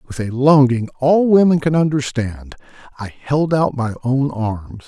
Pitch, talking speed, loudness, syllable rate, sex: 130 Hz, 160 wpm, -16 LUFS, 4.1 syllables/s, male